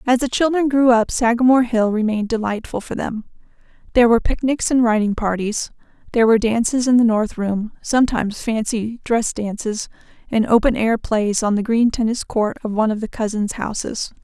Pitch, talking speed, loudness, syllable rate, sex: 230 Hz, 175 wpm, -18 LUFS, 5.6 syllables/s, female